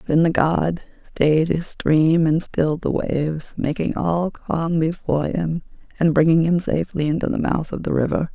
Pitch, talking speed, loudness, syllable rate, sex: 160 Hz, 180 wpm, -20 LUFS, 4.7 syllables/s, female